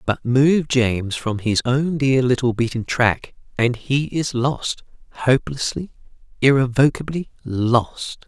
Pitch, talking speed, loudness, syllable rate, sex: 130 Hz, 125 wpm, -20 LUFS, 3.9 syllables/s, male